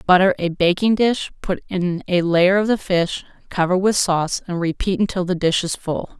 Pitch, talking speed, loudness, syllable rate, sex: 185 Hz, 205 wpm, -19 LUFS, 5.0 syllables/s, female